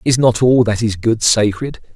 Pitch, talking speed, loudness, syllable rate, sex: 115 Hz, 215 wpm, -14 LUFS, 4.6 syllables/s, male